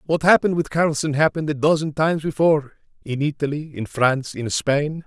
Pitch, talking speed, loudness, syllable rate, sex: 150 Hz, 165 wpm, -20 LUFS, 5.9 syllables/s, male